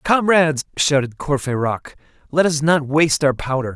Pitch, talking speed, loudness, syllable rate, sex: 145 Hz, 145 wpm, -18 LUFS, 5.4 syllables/s, male